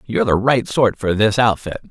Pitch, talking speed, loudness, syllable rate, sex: 110 Hz, 220 wpm, -17 LUFS, 5.3 syllables/s, male